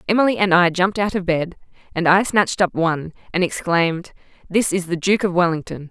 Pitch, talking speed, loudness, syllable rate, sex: 180 Hz, 205 wpm, -19 LUFS, 6.0 syllables/s, female